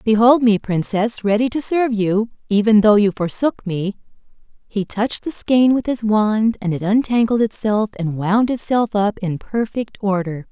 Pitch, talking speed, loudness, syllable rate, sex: 215 Hz, 170 wpm, -18 LUFS, 4.6 syllables/s, female